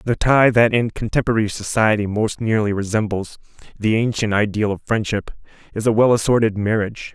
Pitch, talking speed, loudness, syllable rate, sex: 110 Hz, 160 wpm, -19 LUFS, 5.6 syllables/s, male